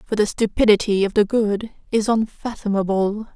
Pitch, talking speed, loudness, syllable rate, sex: 210 Hz, 145 wpm, -20 LUFS, 5.0 syllables/s, female